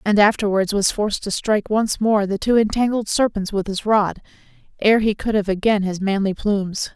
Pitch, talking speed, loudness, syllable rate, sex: 205 Hz, 200 wpm, -19 LUFS, 5.3 syllables/s, female